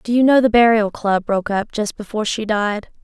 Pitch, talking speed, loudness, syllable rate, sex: 215 Hz, 240 wpm, -17 LUFS, 5.5 syllables/s, female